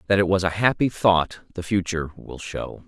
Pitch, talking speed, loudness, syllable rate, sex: 90 Hz, 210 wpm, -23 LUFS, 5.1 syllables/s, male